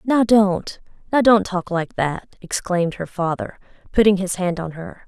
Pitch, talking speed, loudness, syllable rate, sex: 190 Hz, 165 wpm, -20 LUFS, 4.6 syllables/s, female